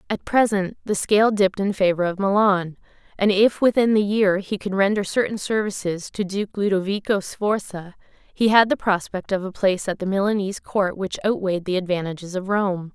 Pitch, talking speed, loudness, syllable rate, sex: 195 Hz, 185 wpm, -21 LUFS, 5.4 syllables/s, female